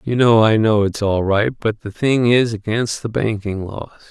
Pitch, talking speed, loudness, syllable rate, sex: 110 Hz, 220 wpm, -17 LUFS, 4.6 syllables/s, male